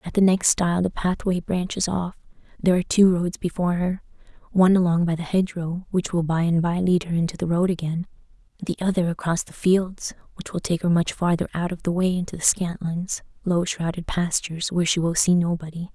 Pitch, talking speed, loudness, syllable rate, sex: 175 Hz, 205 wpm, -23 LUFS, 5.8 syllables/s, female